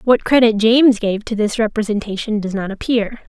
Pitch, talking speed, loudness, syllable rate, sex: 220 Hz, 180 wpm, -16 LUFS, 5.4 syllables/s, female